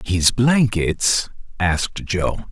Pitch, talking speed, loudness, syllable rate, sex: 100 Hz, 95 wpm, -19 LUFS, 2.9 syllables/s, male